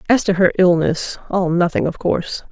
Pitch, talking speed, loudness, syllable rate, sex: 180 Hz, 190 wpm, -17 LUFS, 5.2 syllables/s, female